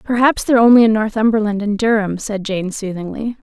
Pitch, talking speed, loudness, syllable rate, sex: 215 Hz, 170 wpm, -16 LUFS, 5.8 syllables/s, female